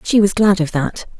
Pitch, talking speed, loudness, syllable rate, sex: 190 Hz, 250 wpm, -16 LUFS, 5.0 syllables/s, female